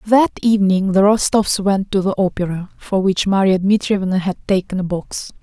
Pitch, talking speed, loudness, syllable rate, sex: 195 Hz, 190 wpm, -17 LUFS, 5.2 syllables/s, female